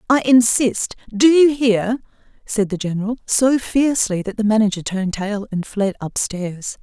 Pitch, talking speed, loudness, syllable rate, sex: 220 Hz, 165 wpm, -18 LUFS, 4.6 syllables/s, female